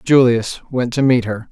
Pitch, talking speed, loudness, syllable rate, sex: 120 Hz, 200 wpm, -16 LUFS, 4.6 syllables/s, male